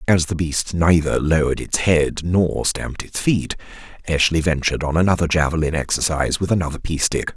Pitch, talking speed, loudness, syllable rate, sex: 80 Hz, 170 wpm, -19 LUFS, 5.6 syllables/s, male